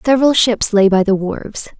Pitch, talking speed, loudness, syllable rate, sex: 220 Hz, 200 wpm, -14 LUFS, 5.7 syllables/s, female